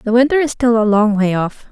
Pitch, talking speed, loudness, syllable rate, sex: 230 Hz, 280 wpm, -14 LUFS, 5.5 syllables/s, female